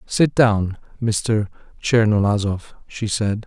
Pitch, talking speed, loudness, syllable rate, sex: 105 Hz, 105 wpm, -20 LUFS, 3.5 syllables/s, male